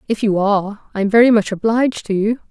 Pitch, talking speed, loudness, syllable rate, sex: 210 Hz, 215 wpm, -16 LUFS, 5.8 syllables/s, female